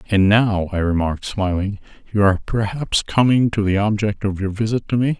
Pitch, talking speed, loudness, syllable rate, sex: 105 Hz, 195 wpm, -19 LUFS, 5.5 syllables/s, male